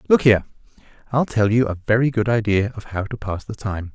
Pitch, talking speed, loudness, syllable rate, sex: 110 Hz, 230 wpm, -20 LUFS, 5.9 syllables/s, male